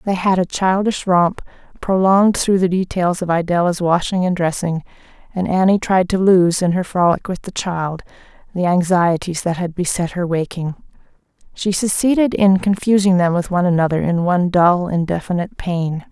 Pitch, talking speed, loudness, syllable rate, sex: 180 Hz, 170 wpm, -17 LUFS, 5.1 syllables/s, female